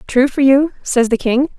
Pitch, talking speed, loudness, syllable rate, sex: 265 Hz, 225 wpm, -14 LUFS, 4.7 syllables/s, female